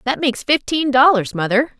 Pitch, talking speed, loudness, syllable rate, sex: 260 Hz, 165 wpm, -16 LUFS, 5.4 syllables/s, female